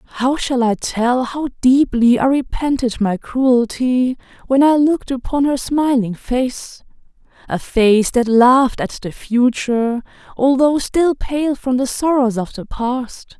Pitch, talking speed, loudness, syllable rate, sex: 255 Hz, 150 wpm, -16 LUFS, 3.7 syllables/s, female